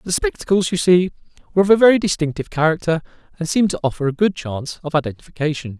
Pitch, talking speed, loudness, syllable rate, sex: 170 Hz, 195 wpm, -18 LUFS, 7.4 syllables/s, male